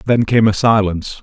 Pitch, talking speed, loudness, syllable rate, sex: 105 Hz, 195 wpm, -14 LUFS, 5.8 syllables/s, male